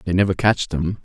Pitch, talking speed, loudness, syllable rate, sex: 95 Hz, 230 wpm, -19 LUFS, 5.8 syllables/s, male